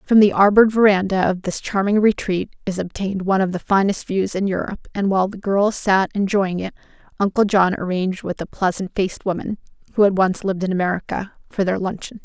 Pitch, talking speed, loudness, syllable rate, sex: 195 Hz, 200 wpm, -19 LUFS, 5.5 syllables/s, female